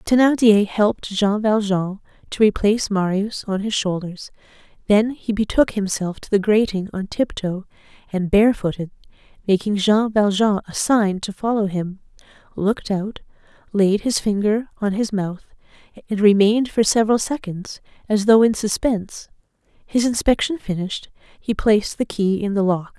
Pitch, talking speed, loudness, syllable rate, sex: 205 Hz, 145 wpm, -19 LUFS, 4.8 syllables/s, female